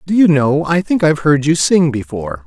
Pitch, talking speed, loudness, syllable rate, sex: 150 Hz, 245 wpm, -14 LUFS, 5.6 syllables/s, male